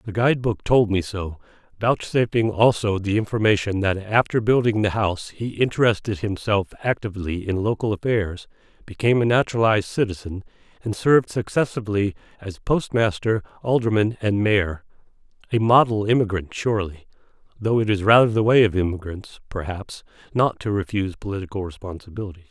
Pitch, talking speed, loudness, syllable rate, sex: 105 Hz, 135 wpm, -21 LUFS, 5.7 syllables/s, male